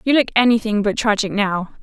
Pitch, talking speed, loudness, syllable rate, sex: 215 Hz, 195 wpm, -17 LUFS, 5.9 syllables/s, female